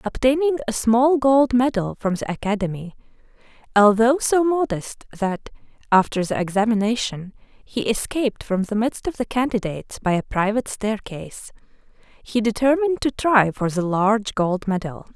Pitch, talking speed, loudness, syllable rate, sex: 225 Hz, 145 wpm, -21 LUFS, 4.9 syllables/s, female